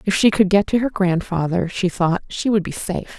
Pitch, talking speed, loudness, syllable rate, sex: 190 Hz, 245 wpm, -19 LUFS, 5.3 syllables/s, female